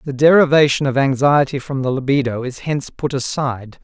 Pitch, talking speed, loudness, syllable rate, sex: 135 Hz, 170 wpm, -17 LUFS, 5.7 syllables/s, male